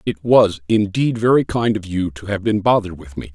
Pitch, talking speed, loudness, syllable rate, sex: 100 Hz, 235 wpm, -17 LUFS, 5.4 syllables/s, male